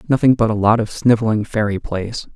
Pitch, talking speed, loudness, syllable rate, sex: 110 Hz, 205 wpm, -17 LUFS, 5.6 syllables/s, male